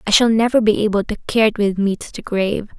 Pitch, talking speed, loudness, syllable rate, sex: 210 Hz, 280 wpm, -17 LUFS, 6.7 syllables/s, female